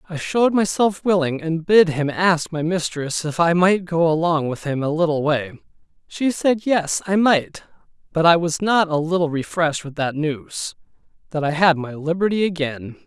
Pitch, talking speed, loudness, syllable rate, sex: 165 Hz, 190 wpm, -20 LUFS, 4.8 syllables/s, male